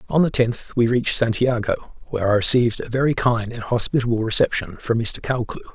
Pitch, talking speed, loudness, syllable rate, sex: 120 Hz, 190 wpm, -20 LUFS, 5.8 syllables/s, male